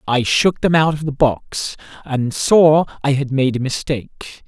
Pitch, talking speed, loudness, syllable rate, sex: 140 Hz, 190 wpm, -17 LUFS, 4.1 syllables/s, male